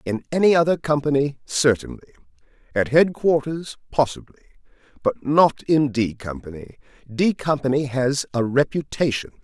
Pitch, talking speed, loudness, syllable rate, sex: 140 Hz, 115 wpm, -21 LUFS, 4.8 syllables/s, male